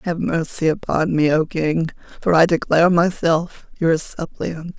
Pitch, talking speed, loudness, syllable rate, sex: 165 Hz, 150 wpm, -19 LUFS, 4.3 syllables/s, female